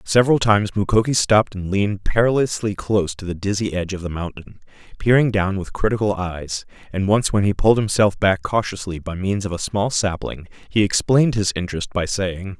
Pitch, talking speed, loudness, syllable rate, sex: 100 Hz, 190 wpm, -20 LUFS, 5.7 syllables/s, male